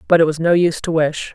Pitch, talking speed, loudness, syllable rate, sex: 165 Hz, 315 wpm, -16 LUFS, 6.7 syllables/s, female